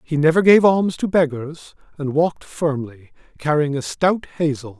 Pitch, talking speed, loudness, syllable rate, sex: 155 Hz, 165 wpm, -19 LUFS, 4.7 syllables/s, male